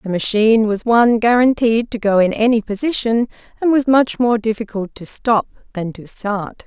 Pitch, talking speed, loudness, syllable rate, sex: 225 Hz, 180 wpm, -16 LUFS, 5.0 syllables/s, female